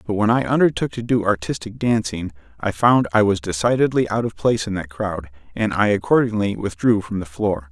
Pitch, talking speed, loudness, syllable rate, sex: 100 Hz, 200 wpm, -20 LUFS, 5.6 syllables/s, male